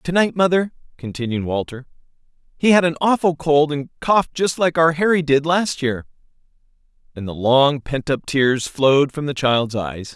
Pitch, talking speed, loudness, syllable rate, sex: 145 Hz, 170 wpm, -18 LUFS, 4.8 syllables/s, male